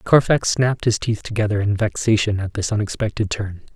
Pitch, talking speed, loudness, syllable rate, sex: 105 Hz, 175 wpm, -20 LUFS, 5.7 syllables/s, male